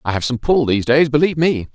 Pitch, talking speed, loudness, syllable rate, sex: 135 Hz, 275 wpm, -16 LUFS, 6.8 syllables/s, male